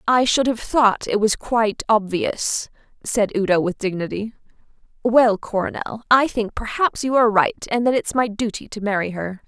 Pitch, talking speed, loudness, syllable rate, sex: 220 Hz, 175 wpm, -20 LUFS, 4.8 syllables/s, female